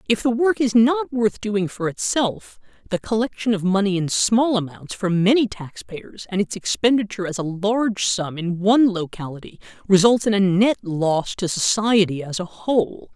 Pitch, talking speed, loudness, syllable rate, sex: 200 Hz, 180 wpm, -20 LUFS, 4.8 syllables/s, male